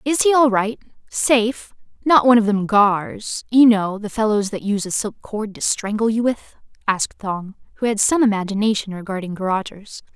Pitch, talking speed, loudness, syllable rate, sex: 215 Hz, 165 wpm, -19 LUFS, 5.2 syllables/s, female